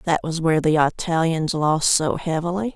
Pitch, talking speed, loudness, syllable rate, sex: 165 Hz, 175 wpm, -20 LUFS, 5.1 syllables/s, female